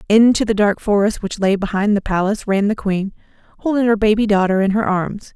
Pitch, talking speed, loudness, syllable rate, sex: 205 Hz, 215 wpm, -17 LUFS, 5.7 syllables/s, female